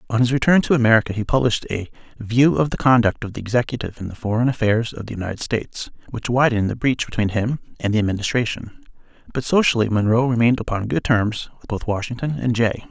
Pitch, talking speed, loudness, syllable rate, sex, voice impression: 115 Hz, 205 wpm, -20 LUFS, 6.7 syllables/s, male, very masculine, very adult-like, slightly old, very thick, tensed, very powerful, slightly dark, slightly hard, slightly muffled, fluent, slightly raspy, cool, intellectual, sincere, calm, very mature, friendly, reassuring, unique, very wild, sweet, kind, slightly modest